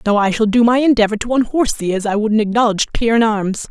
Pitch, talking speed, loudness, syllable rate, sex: 220 Hz, 275 wpm, -15 LUFS, 6.8 syllables/s, female